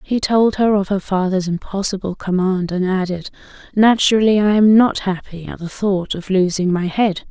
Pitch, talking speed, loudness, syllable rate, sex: 195 Hz, 180 wpm, -17 LUFS, 4.9 syllables/s, female